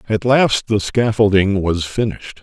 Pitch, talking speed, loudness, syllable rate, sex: 105 Hz, 150 wpm, -16 LUFS, 4.6 syllables/s, male